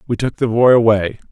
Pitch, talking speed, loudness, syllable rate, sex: 115 Hz, 230 wpm, -14 LUFS, 5.8 syllables/s, male